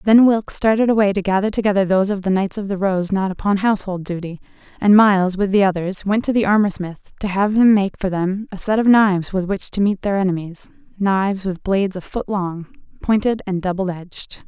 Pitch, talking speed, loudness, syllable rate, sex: 195 Hz, 220 wpm, -18 LUFS, 5.7 syllables/s, female